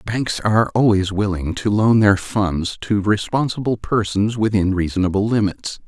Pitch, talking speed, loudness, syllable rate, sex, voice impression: 105 Hz, 145 wpm, -18 LUFS, 4.6 syllables/s, male, very masculine, very adult-like, middle-aged, very thick, slightly tensed, powerful, bright, slightly soft, muffled, fluent, very cool, very intellectual, very sincere, very calm, very mature, friendly, reassuring, very wild, slightly lively, kind